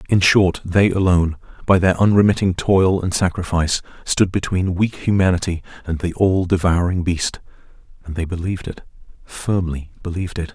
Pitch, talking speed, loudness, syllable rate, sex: 90 Hz, 150 wpm, -18 LUFS, 5.3 syllables/s, male